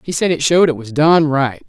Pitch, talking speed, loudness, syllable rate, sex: 150 Hz, 285 wpm, -14 LUFS, 5.8 syllables/s, male